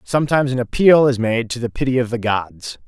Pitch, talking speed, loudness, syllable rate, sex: 125 Hz, 230 wpm, -17 LUFS, 5.8 syllables/s, male